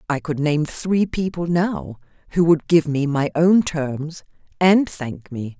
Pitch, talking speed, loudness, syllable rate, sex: 155 Hz, 170 wpm, -20 LUFS, 3.7 syllables/s, female